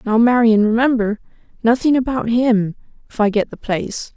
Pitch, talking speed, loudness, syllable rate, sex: 230 Hz, 145 wpm, -17 LUFS, 5.2 syllables/s, female